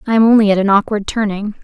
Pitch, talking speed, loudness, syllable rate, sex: 210 Hz, 260 wpm, -14 LUFS, 6.9 syllables/s, female